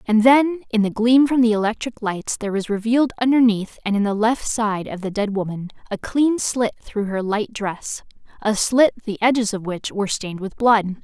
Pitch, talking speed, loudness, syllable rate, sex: 220 Hz, 205 wpm, -20 LUFS, 5.1 syllables/s, female